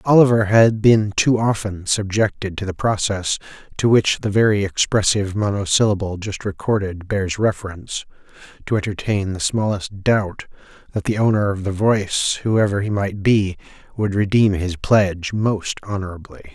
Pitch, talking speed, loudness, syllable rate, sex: 100 Hz, 145 wpm, -19 LUFS, 4.9 syllables/s, male